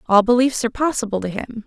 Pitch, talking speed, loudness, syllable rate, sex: 230 Hz, 215 wpm, -19 LUFS, 6.5 syllables/s, female